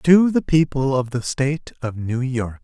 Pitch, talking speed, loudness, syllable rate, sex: 135 Hz, 205 wpm, -20 LUFS, 4.4 syllables/s, male